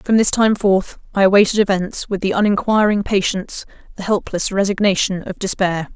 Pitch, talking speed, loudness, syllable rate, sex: 195 Hz, 160 wpm, -17 LUFS, 5.4 syllables/s, female